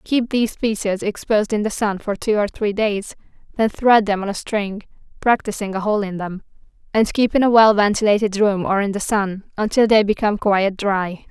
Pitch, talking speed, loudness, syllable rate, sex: 205 Hz, 205 wpm, -19 LUFS, 4.9 syllables/s, female